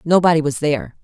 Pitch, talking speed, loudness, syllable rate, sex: 155 Hz, 175 wpm, -17 LUFS, 6.7 syllables/s, female